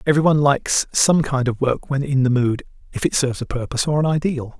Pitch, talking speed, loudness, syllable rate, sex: 135 Hz, 235 wpm, -19 LUFS, 6.3 syllables/s, male